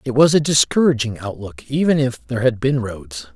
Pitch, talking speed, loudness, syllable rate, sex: 120 Hz, 195 wpm, -18 LUFS, 5.3 syllables/s, male